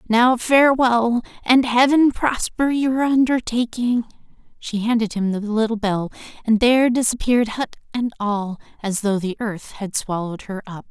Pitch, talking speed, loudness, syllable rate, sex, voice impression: 230 Hz, 150 wpm, -19 LUFS, 4.6 syllables/s, female, very feminine, very young, very thin, tensed, powerful, very bright, soft, very clear, fluent, very cute, intellectual, very refreshing, slightly sincere, calm, very friendly, very reassuring, very unique, elegant, slightly wild, sweet, very lively, kind, intense, slightly sharp, light